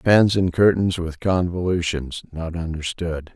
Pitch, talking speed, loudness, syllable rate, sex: 85 Hz, 105 wpm, -21 LUFS, 4.2 syllables/s, male